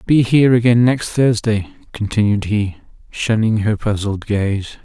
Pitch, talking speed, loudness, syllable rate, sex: 110 Hz, 150 wpm, -16 LUFS, 4.8 syllables/s, male